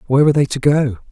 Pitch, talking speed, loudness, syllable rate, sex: 140 Hz, 270 wpm, -15 LUFS, 8.2 syllables/s, male